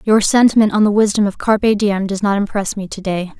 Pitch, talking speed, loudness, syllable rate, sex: 205 Hz, 230 wpm, -15 LUFS, 5.8 syllables/s, female